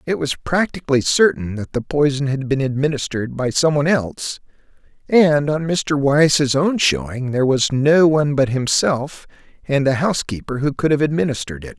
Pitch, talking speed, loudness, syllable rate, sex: 140 Hz, 170 wpm, -18 LUFS, 5.3 syllables/s, male